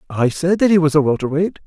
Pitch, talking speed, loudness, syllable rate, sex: 160 Hz, 290 wpm, -16 LUFS, 6.2 syllables/s, male